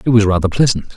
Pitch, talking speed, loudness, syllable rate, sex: 105 Hz, 250 wpm, -14 LUFS, 7.9 syllables/s, male